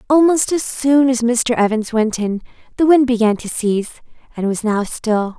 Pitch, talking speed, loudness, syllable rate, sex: 240 Hz, 190 wpm, -16 LUFS, 4.8 syllables/s, female